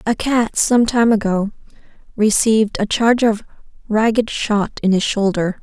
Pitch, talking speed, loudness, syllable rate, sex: 215 Hz, 150 wpm, -17 LUFS, 4.6 syllables/s, female